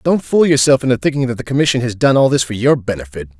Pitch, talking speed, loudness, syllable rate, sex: 125 Hz, 265 wpm, -14 LUFS, 6.8 syllables/s, male